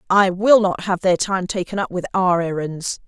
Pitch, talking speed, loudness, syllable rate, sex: 185 Hz, 215 wpm, -19 LUFS, 4.7 syllables/s, female